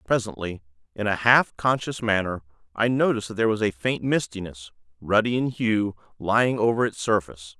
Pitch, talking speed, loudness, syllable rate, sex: 105 Hz, 165 wpm, -24 LUFS, 5.6 syllables/s, male